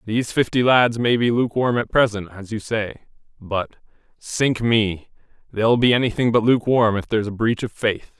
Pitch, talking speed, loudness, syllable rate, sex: 115 Hz, 170 wpm, -20 LUFS, 5.2 syllables/s, male